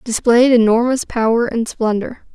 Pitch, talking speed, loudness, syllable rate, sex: 235 Hz, 130 wpm, -15 LUFS, 4.6 syllables/s, female